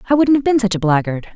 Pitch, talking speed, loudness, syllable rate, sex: 225 Hz, 310 wpm, -16 LUFS, 7.3 syllables/s, female